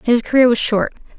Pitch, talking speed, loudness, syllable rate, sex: 235 Hz, 205 wpm, -16 LUFS, 5.6 syllables/s, female